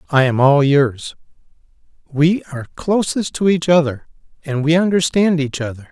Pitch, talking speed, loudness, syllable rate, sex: 155 Hz, 150 wpm, -16 LUFS, 4.8 syllables/s, male